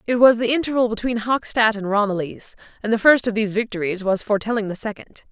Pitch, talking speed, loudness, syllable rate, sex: 220 Hz, 205 wpm, -20 LUFS, 6.4 syllables/s, female